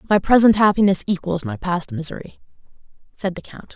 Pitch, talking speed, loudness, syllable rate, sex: 190 Hz, 160 wpm, -19 LUFS, 5.9 syllables/s, female